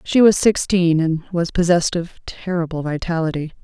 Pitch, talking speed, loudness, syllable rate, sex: 170 Hz, 150 wpm, -18 LUFS, 5.3 syllables/s, female